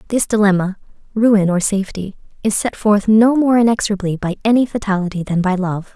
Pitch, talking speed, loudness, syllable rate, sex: 205 Hz, 170 wpm, -16 LUFS, 5.8 syllables/s, female